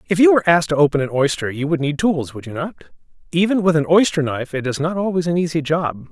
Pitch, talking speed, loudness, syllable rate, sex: 160 Hz, 265 wpm, -18 LUFS, 6.7 syllables/s, male